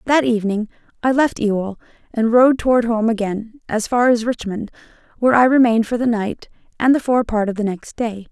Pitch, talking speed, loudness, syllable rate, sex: 230 Hz, 195 wpm, -18 LUFS, 5.7 syllables/s, female